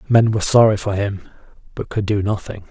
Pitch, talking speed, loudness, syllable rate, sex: 105 Hz, 200 wpm, -18 LUFS, 5.8 syllables/s, male